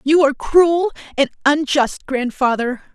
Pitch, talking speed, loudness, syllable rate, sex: 285 Hz, 120 wpm, -17 LUFS, 4.4 syllables/s, female